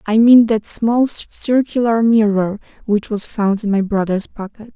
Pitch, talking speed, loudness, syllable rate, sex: 215 Hz, 165 wpm, -16 LUFS, 4.1 syllables/s, female